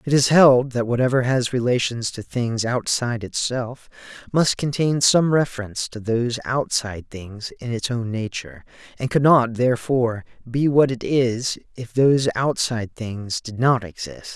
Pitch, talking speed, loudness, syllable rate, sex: 120 Hz, 160 wpm, -21 LUFS, 4.7 syllables/s, male